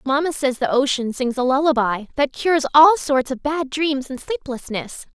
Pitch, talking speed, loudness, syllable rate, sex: 275 Hz, 185 wpm, -19 LUFS, 4.8 syllables/s, female